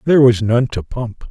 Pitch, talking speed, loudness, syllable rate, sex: 120 Hz, 230 wpm, -16 LUFS, 5.2 syllables/s, male